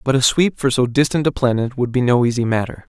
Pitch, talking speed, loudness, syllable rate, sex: 125 Hz, 265 wpm, -17 LUFS, 6.1 syllables/s, male